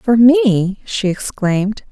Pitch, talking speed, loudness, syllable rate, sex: 220 Hz, 125 wpm, -15 LUFS, 3.3 syllables/s, female